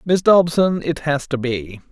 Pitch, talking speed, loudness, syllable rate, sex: 150 Hz, 190 wpm, -18 LUFS, 4.0 syllables/s, male